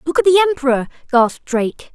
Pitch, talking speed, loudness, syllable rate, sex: 285 Hz, 185 wpm, -16 LUFS, 8.3 syllables/s, female